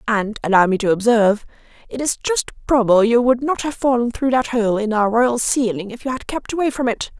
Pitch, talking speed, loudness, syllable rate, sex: 235 Hz, 235 wpm, -18 LUFS, 5.6 syllables/s, female